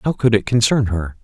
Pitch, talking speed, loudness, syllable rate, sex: 110 Hz, 240 wpm, -17 LUFS, 5.6 syllables/s, male